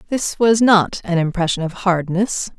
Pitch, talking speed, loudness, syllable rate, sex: 190 Hz, 160 wpm, -17 LUFS, 4.4 syllables/s, female